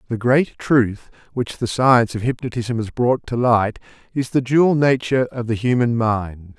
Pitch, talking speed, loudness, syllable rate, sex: 120 Hz, 180 wpm, -19 LUFS, 4.7 syllables/s, male